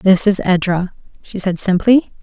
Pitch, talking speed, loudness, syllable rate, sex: 190 Hz, 160 wpm, -15 LUFS, 4.3 syllables/s, female